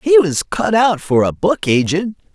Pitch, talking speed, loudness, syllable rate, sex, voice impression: 185 Hz, 205 wpm, -15 LUFS, 4.3 syllables/s, male, very masculine, slightly old, thick, slightly sincere, slightly friendly, wild